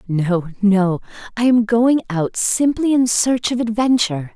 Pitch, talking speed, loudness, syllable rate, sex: 220 Hz, 150 wpm, -17 LUFS, 4.1 syllables/s, female